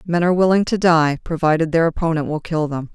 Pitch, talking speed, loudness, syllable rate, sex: 165 Hz, 225 wpm, -18 LUFS, 6.1 syllables/s, female